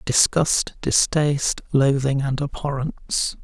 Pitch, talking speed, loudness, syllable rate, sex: 140 Hz, 85 wpm, -21 LUFS, 3.8 syllables/s, male